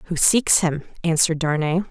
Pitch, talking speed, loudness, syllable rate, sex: 165 Hz, 160 wpm, -19 LUFS, 5.6 syllables/s, female